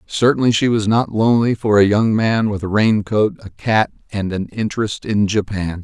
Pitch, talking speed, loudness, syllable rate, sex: 105 Hz, 195 wpm, -17 LUFS, 4.9 syllables/s, male